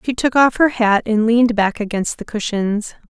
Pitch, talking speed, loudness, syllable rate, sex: 220 Hz, 210 wpm, -17 LUFS, 5.0 syllables/s, female